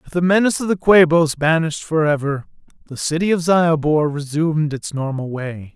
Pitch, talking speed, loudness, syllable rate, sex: 155 Hz, 165 wpm, -18 LUFS, 5.4 syllables/s, male